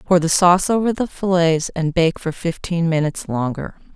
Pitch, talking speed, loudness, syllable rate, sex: 170 Hz, 180 wpm, -18 LUFS, 5.1 syllables/s, female